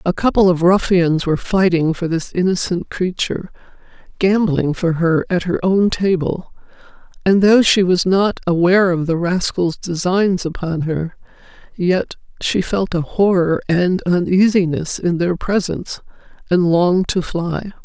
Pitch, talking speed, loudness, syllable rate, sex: 180 Hz, 145 wpm, -17 LUFS, 4.4 syllables/s, female